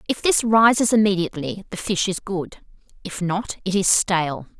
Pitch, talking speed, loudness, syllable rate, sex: 190 Hz, 170 wpm, -20 LUFS, 5.1 syllables/s, female